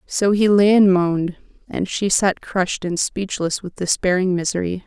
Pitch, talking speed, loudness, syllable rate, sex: 185 Hz, 175 wpm, -19 LUFS, 4.7 syllables/s, female